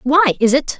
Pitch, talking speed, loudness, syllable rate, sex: 270 Hz, 230 wpm, -14 LUFS, 4.7 syllables/s, female